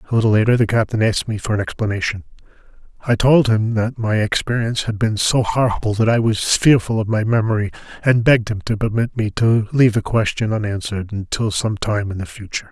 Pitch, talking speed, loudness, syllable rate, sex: 110 Hz, 210 wpm, -18 LUFS, 6.1 syllables/s, male